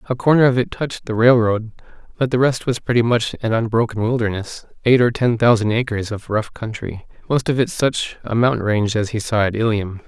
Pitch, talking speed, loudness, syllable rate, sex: 115 Hz, 215 wpm, -18 LUFS, 5.6 syllables/s, male